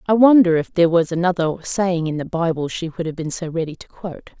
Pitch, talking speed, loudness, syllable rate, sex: 170 Hz, 245 wpm, -19 LUFS, 6.1 syllables/s, female